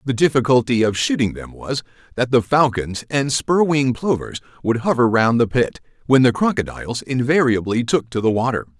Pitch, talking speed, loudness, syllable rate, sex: 125 Hz, 170 wpm, -18 LUFS, 5.2 syllables/s, male